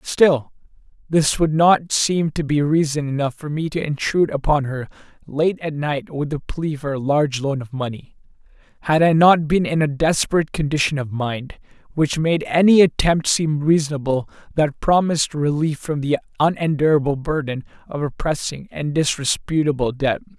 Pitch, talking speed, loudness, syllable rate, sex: 150 Hz, 165 wpm, -19 LUFS, 5.0 syllables/s, male